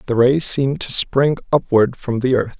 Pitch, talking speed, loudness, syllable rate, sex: 130 Hz, 210 wpm, -17 LUFS, 4.9 syllables/s, male